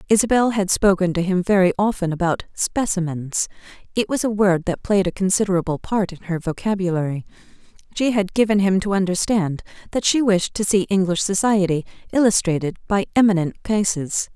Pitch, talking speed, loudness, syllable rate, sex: 190 Hz, 160 wpm, -20 LUFS, 5.5 syllables/s, female